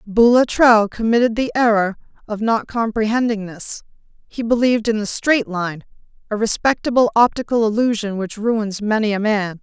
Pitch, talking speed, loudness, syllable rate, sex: 220 Hz, 145 wpm, -18 LUFS, 5.2 syllables/s, female